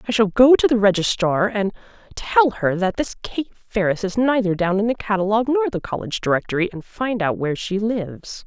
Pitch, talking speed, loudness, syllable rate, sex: 210 Hz, 205 wpm, -20 LUFS, 5.7 syllables/s, female